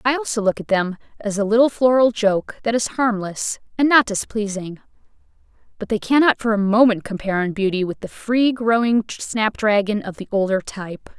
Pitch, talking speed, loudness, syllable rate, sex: 215 Hz, 180 wpm, -19 LUFS, 5.2 syllables/s, female